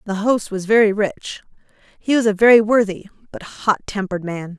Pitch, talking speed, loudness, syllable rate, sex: 205 Hz, 185 wpm, -17 LUFS, 5.7 syllables/s, female